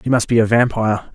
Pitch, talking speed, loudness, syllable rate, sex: 115 Hz, 265 wpm, -16 LUFS, 6.4 syllables/s, male